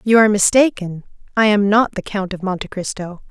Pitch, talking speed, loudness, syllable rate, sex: 205 Hz, 180 wpm, -17 LUFS, 5.6 syllables/s, female